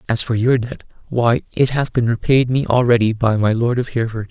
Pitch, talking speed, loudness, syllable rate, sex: 120 Hz, 225 wpm, -17 LUFS, 5.5 syllables/s, male